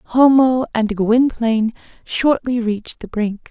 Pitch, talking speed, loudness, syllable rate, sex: 235 Hz, 120 wpm, -17 LUFS, 3.8 syllables/s, female